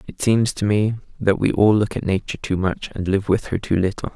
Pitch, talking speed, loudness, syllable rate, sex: 100 Hz, 260 wpm, -20 LUFS, 5.6 syllables/s, male